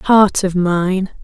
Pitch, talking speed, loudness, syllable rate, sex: 185 Hz, 145 wpm, -15 LUFS, 2.6 syllables/s, female